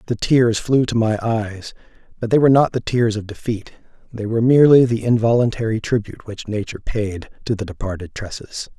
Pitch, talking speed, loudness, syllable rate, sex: 115 Hz, 185 wpm, -18 LUFS, 5.7 syllables/s, male